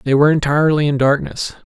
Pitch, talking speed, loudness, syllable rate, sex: 145 Hz, 175 wpm, -16 LUFS, 6.9 syllables/s, male